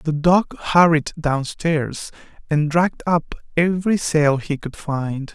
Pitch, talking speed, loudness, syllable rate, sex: 160 Hz, 135 wpm, -20 LUFS, 3.7 syllables/s, male